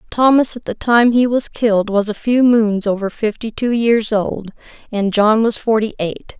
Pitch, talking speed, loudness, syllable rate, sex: 220 Hz, 195 wpm, -16 LUFS, 4.5 syllables/s, female